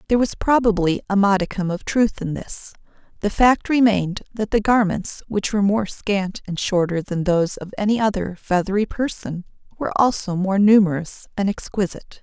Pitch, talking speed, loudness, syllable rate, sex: 200 Hz, 160 wpm, -20 LUFS, 5.3 syllables/s, female